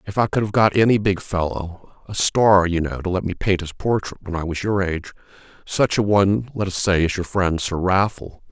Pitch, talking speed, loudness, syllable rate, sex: 95 Hz, 230 wpm, -20 LUFS, 5.3 syllables/s, male